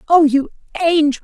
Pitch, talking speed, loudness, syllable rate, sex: 305 Hz, 145 wpm, -15 LUFS, 5.3 syllables/s, female